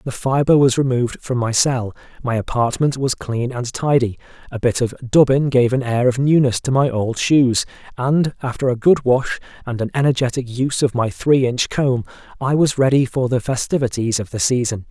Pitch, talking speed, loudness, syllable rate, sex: 125 Hz, 195 wpm, -18 LUFS, 5.1 syllables/s, male